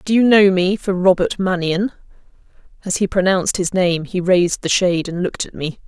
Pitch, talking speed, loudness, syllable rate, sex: 185 Hz, 205 wpm, -17 LUFS, 5.6 syllables/s, female